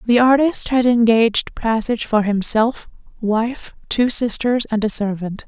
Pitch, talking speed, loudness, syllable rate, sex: 230 Hz, 145 wpm, -17 LUFS, 4.3 syllables/s, female